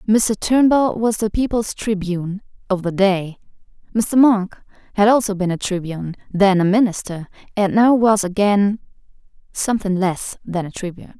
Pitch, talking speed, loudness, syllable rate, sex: 200 Hz, 145 wpm, -18 LUFS, 4.8 syllables/s, female